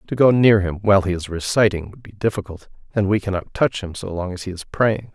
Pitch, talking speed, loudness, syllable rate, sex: 100 Hz, 255 wpm, -20 LUFS, 5.9 syllables/s, male